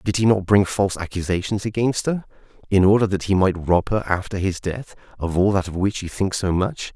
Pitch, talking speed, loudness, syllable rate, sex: 95 Hz, 235 wpm, -21 LUFS, 5.5 syllables/s, male